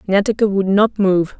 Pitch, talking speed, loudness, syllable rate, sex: 200 Hz, 170 wpm, -16 LUFS, 4.9 syllables/s, female